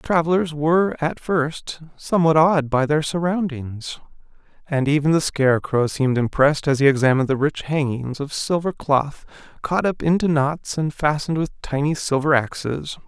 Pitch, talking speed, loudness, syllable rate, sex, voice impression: 150 Hz, 160 wpm, -20 LUFS, 5.0 syllables/s, male, masculine, adult-like, tensed, powerful, bright, clear, fluent, intellectual, friendly, lively, slightly strict, slightly sharp